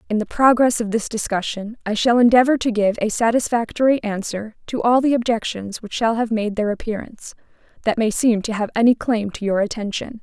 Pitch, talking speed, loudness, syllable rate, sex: 225 Hz, 200 wpm, -19 LUFS, 5.6 syllables/s, female